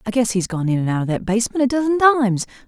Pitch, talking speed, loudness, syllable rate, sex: 225 Hz, 290 wpm, -19 LUFS, 7.1 syllables/s, female